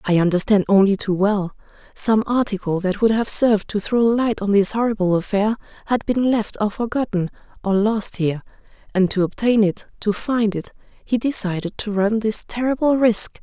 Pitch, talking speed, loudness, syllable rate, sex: 210 Hz, 180 wpm, -19 LUFS, 5.0 syllables/s, female